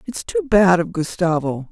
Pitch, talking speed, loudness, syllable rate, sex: 180 Hz, 175 wpm, -18 LUFS, 4.4 syllables/s, female